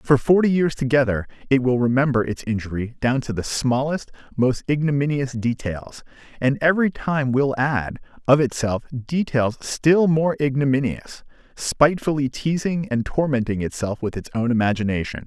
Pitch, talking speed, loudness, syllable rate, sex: 130 Hz, 140 wpm, -21 LUFS, 4.9 syllables/s, male